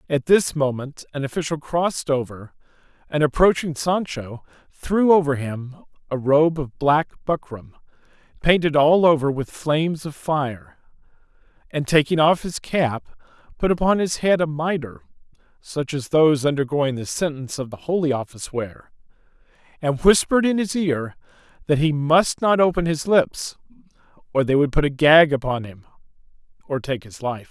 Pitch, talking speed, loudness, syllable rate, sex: 150 Hz, 155 wpm, -21 LUFS, 4.8 syllables/s, male